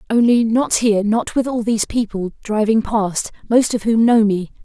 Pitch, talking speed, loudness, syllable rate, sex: 220 Hz, 195 wpm, -17 LUFS, 4.9 syllables/s, female